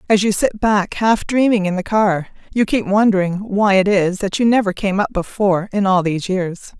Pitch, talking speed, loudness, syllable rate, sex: 200 Hz, 220 wpm, -17 LUFS, 5.1 syllables/s, female